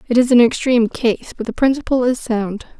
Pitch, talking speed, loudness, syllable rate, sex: 240 Hz, 215 wpm, -16 LUFS, 5.6 syllables/s, female